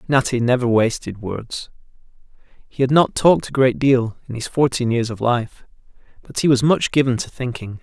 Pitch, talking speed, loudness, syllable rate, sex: 125 Hz, 185 wpm, -19 LUFS, 5.1 syllables/s, male